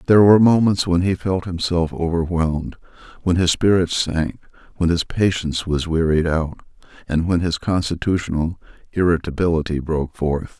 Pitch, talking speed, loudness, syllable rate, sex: 85 Hz, 140 wpm, -19 LUFS, 5.3 syllables/s, male